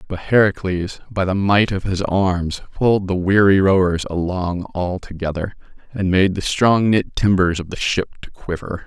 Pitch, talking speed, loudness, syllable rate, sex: 95 Hz, 175 wpm, -18 LUFS, 4.6 syllables/s, male